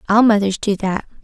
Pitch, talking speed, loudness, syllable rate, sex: 210 Hz, 195 wpm, -17 LUFS, 5.6 syllables/s, female